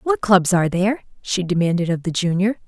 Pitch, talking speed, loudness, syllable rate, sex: 190 Hz, 200 wpm, -19 LUFS, 6.1 syllables/s, female